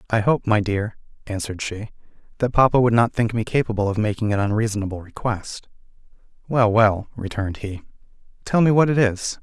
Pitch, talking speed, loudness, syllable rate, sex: 110 Hz, 170 wpm, -21 LUFS, 5.8 syllables/s, male